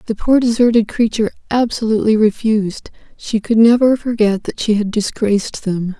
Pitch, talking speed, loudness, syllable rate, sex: 220 Hz, 150 wpm, -15 LUFS, 5.4 syllables/s, female